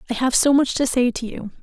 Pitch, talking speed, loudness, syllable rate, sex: 250 Hz, 295 wpm, -19 LUFS, 6.0 syllables/s, female